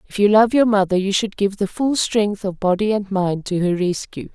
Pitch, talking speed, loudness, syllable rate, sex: 200 Hz, 250 wpm, -19 LUFS, 5.1 syllables/s, female